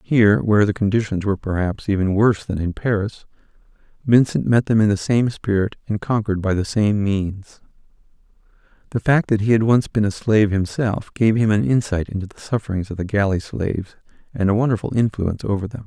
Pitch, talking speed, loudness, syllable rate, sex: 105 Hz, 195 wpm, -20 LUFS, 5.8 syllables/s, male